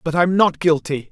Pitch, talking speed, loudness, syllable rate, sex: 165 Hz, 215 wpm, -17 LUFS, 5.0 syllables/s, male